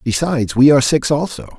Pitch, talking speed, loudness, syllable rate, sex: 135 Hz, 190 wpm, -14 LUFS, 6.4 syllables/s, male